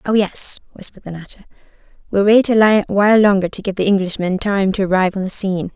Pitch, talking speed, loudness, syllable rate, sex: 195 Hz, 200 wpm, -16 LUFS, 6.3 syllables/s, female